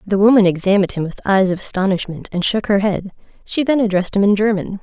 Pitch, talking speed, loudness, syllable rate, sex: 200 Hz, 225 wpm, -17 LUFS, 6.4 syllables/s, female